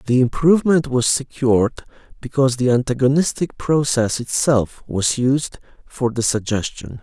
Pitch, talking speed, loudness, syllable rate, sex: 130 Hz, 120 wpm, -18 LUFS, 4.7 syllables/s, male